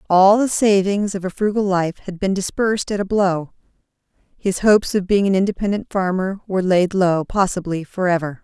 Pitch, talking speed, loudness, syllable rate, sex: 190 Hz, 180 wpm, -19 LUFS, 5.3 syllables/s, female